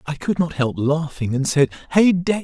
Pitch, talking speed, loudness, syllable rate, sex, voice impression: 155 Hz, 220 wpm, -19 LUFS, 4.8 syllables/s, male, masculine, adult-like, tensed, powerful, slightly halting, slightly raspy, mature, unique, wild, lively, strict, intense, slightly sharp